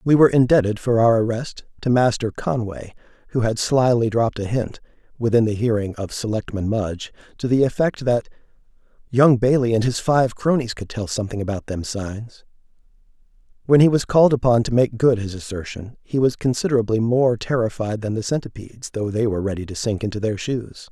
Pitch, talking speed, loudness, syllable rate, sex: 115 Hz, 185 wpm, -20 LUFS, 5.6 syllables/s, male